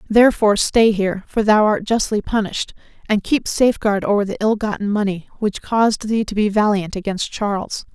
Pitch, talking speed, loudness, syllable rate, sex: 210 Hz, 190 wpm, -18 LUFS, 5.6 syllables/s, female